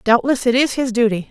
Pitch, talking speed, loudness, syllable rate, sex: 240 Hz, 230 wpm, -17 LUFS, 5.8 syllables/s, female